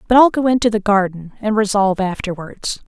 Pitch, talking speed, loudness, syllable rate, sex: 205 Hz, 185 wpm, -17 LUFS, 5.8 syllables/s, female